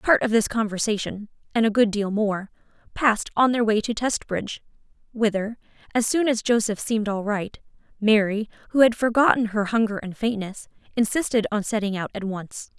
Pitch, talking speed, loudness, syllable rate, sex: 215 Hz, 175 wpm, -23 LUFS, 5.4 syllables/s, female